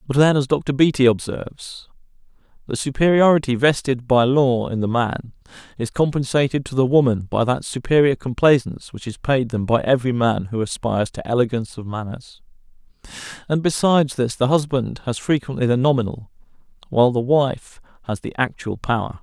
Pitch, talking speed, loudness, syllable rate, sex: 130 Hz, 160 wpm, -19 LUFS, 5.5 syllables/s, male